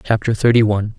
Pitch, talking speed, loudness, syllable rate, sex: 110 Hz, 185 wpm, -16 LUFS, 6.8 syllables/s, male